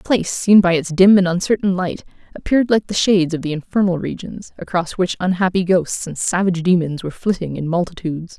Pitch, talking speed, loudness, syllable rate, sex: 180 Hz, 200 wpm, -17 LUFS, 6.0 syllables/s, female